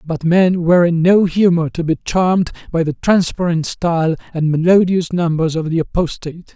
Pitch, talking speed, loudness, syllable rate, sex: 170 Hz, 175 wpm, -15 LUFS, 5.2 syllables/s, male